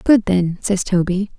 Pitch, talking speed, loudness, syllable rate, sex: 190 Hz, 175 wpm, -18 LUFS, 4.2 syllables/s, female